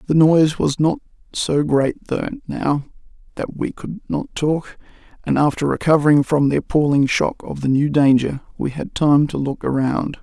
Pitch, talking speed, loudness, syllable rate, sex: 145 Hz, 175 wpm, -19 LUFS, 4.5 syllables/s, male